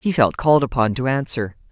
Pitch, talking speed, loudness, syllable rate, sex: 130 Hz, 210 wpm, -19 LUFS, 5.8 syllables/s, female